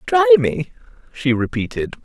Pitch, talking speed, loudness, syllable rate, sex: 165 Hz, 120 wpm, -17 LUFS, 4.8 syllables/s, male